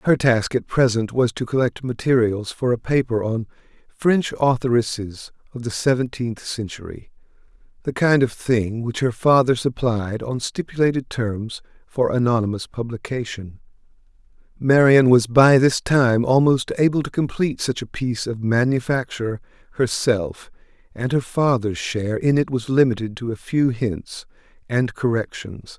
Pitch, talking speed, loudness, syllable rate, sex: 120 Hz, 140 wpm, -20 LUFS, 4.6 syllables/s, male